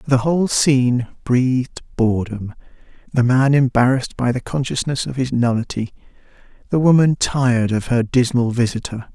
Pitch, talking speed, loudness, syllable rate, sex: 125 Hz, 140 wpm, -18 LUFS, 5.3 syllables/s, male